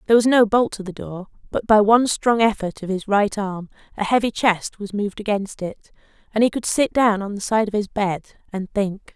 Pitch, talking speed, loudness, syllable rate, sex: 210 Hz, 235 wpm, -20 LUFS, 5.5 syllables/s, female